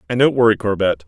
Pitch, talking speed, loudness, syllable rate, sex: 105 Hz, 225 wpm, -16 LUFS, 6.7 syllables/s, male